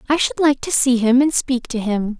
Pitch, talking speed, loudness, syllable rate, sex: 255 Hz, 275 wpm, -17 LUFS, 5.1 syllables/s, female